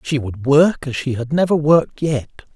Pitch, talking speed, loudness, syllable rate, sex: 145 Hz, 210 wpm, -17 LUFS, 5.0 syllables/s, male